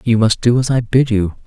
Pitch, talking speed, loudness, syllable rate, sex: 115 Hz, 285 wpm, -15 LUFS, 5.3 syllables/s, male